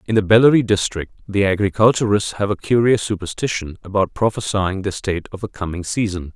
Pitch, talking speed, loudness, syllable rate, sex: 100 Hz, 170 wpm, -18 LUFS, 5.9 syllables/s, male